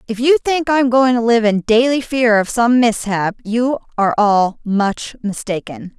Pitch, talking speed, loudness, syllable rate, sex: 230 Hz, 180 wpm, -15 LUFS, 4.3 syllables/s, female